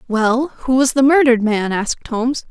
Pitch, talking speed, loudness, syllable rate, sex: 245 Hz, 190 wpm, -16 LUFS, 5.2 syllables/s, female